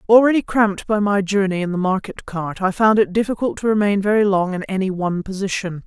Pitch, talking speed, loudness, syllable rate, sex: 200 Hz, 215 wpm, -19 LUFS, 6.0 syllables/s, female